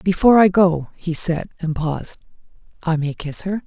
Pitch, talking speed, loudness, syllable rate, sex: 170 Hz, 165 wpm, -19 LUFS, 4.9 syllables/s, female